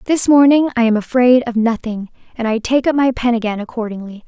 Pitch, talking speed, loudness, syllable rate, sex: 240 Hz, 210 wpm, -15 LUFS, 5.9 syllables/s, female